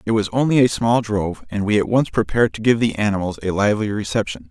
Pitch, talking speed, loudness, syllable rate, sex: 105 Hz, 240 wpm, -19 LUFS, 6.5 syllables/s, male